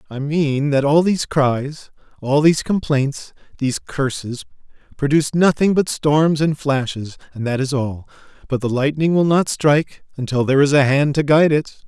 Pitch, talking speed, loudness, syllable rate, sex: 145 Hz, 175 wpm, -18 LUFS, 5.0 syllables/s, male